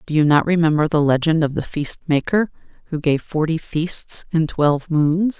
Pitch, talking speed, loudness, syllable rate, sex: 160 Hz, 190 wpm, -19 LUFS, 4.8 syllables/s, female